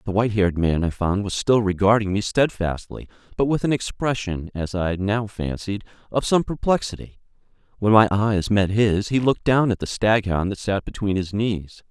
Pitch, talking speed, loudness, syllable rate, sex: 105 Hz, 190 wpm, -22 LUFS, 5.1 syllables/s, male